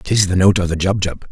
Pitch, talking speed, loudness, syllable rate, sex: 95 Hz, 275 wpm, -16 LUFS, 5.7 syllables/s, male